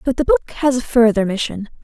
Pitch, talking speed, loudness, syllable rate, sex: 225 Hz, 230 wpm, -17 LUFS, 6.4 syllables/s, female